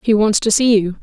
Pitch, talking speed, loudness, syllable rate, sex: 215 Hz, 295 wpm, -14 LUFS, 5.6 syllables/s, female